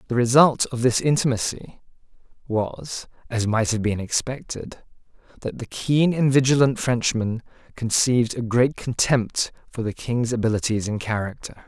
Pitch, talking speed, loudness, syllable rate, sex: 120 Hz, 140 wpm, -22 LUFS, 4.7 syllables/s, male